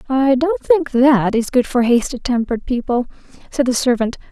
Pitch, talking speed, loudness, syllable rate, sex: 255 Hz, 180 wpm, -17 LUFS, 5.0 syllables/s, female